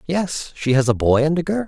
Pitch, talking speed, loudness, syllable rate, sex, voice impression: 155 Hz, 285 wpm, -19 LUFS, 5.3 syllables/s, male, very masculine, very adult-like, very middle-aged, tensed, very powerful, slightly dark, slightly soft, muffled, fluent, slightly raspy, very cool, intellectual, sincere, very calm, very mature, very friendly, very reassuring, very unique, very wild, sweet, lively, kind, intense